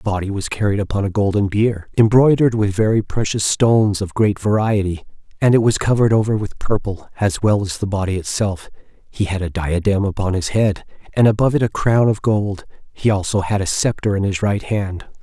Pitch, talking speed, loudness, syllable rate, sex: 100 Hz, 205 wpm, -18 LUFS, 5.6 syllables/s, male